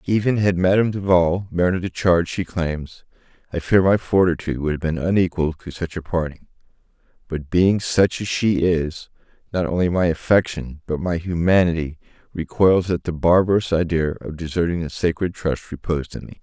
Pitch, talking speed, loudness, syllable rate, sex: 85 Hz, 170 wpm, -20 LUFS, 5.3 syllables/s, male